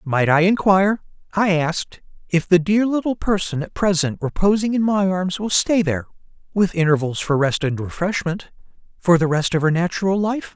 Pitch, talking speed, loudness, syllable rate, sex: 180 Hz, 180 wpm, -19 LUFS, 4.6 syllables/s, male